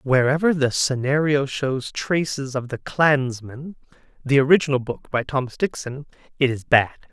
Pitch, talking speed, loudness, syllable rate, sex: 135 Hz, 145 wpm, -21 LUFS, 4.6 syllables/s, male